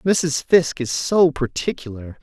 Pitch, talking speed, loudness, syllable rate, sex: 145 Hz, 135 wpm, -19 LUFS, 4.2 syllables/s, male